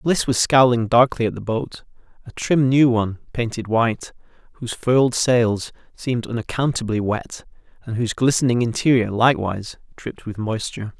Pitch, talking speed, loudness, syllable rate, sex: 120 Hz, 145 wpm, -20 LUFS, 5.5 syllables/s, male